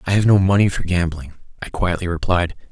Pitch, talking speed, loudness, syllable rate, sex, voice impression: 90 Hz, 200 wpm, -18 LUFS, 5.9 syllables/s, male, very masculine, adult-like, slightly thick, fluent, cool, sincere, slightly calm